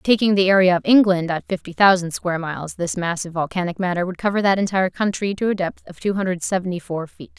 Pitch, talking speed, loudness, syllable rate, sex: 185 Hz, 235 wpm, -20 LUFS, 6.4 syllables/s, female